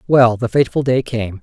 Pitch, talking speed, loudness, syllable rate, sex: 120 Hz, 210 wpm, -16 LUFS, 5.5 syllables/s, male